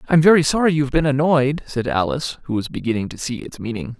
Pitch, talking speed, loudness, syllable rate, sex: 135 Hz, 225 wpm, -19 LUFS, 6.5 syllables/s, male